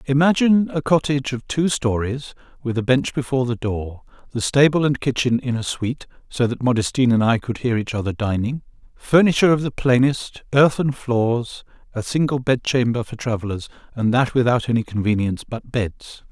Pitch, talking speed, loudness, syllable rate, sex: 125 Hz, 175 wpm, -20 LUFS, 5.4 syllables/s, male